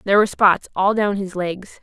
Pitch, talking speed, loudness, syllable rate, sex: 195 Hz, 230 wpm, -19 LUFS, 5.5 syllables/s, female